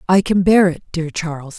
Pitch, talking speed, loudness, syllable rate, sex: 175 Hz, 225 wpm, -17 LUFS, 5.2 syllables/s, female